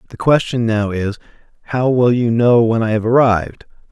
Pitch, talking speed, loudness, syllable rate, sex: 115 Hz, 185 wpm, -15 LUFS, 5.1 syllables/s, male